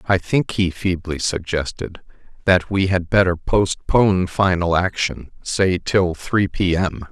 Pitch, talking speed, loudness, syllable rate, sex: 90 Hz, 145 wpm, -19 LUFS, 3.9 syllables/s, male